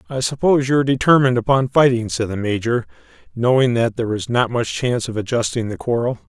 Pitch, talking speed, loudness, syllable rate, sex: 120 Hz, 200 wpm, -18 LUFS, 6.5 syllables/s, male